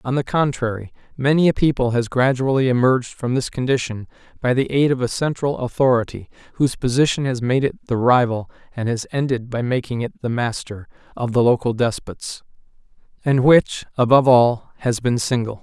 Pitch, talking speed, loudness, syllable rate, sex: 125 Hz, 175 wpm, -19 LUFS, 5.5 syllables/s, male